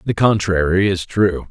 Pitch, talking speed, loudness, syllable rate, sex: 95 Hz, 160 wpm, -17 LUFS, 4.5 syllables/s, male